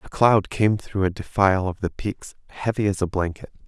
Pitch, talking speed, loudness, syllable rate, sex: 95 Hz, 210 wpm, -23 LUFS, 5.2 syllables/s, male